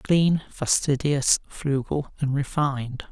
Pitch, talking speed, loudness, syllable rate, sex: 140 Hz, 95 wpm, -24 LUFS, 3.5 syllables/s, male